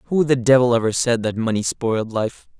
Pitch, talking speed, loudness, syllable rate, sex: 120 Hz, 210 wpm, -19 LUFS, 5.7 syllables/s, male